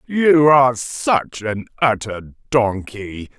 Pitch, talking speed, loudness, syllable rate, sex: 120 Hz, 105 wpm, -17 LUFS, 3.2 syllables/s, male